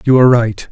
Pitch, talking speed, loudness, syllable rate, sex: 120 Hz, 255 wpm, -11 LUFS, 6.8 syllables/s, male